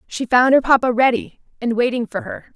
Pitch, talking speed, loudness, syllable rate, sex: 245 Hz, 210 wpm, -17 LUFS, 5.5 syllables/s, female